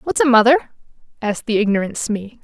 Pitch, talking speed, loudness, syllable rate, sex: 235 Hz, 175 wpm, -17 LUFS, 5.7 syllables/s, female